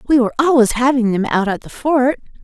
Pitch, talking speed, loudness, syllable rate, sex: 250 Hz, 220 wpm, -16 LUFS, 6.0 syllables/s, female